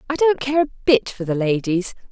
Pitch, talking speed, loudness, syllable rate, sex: 235 Hz, 225 wpm, -20 LUFS, 5.6 syllables/s, female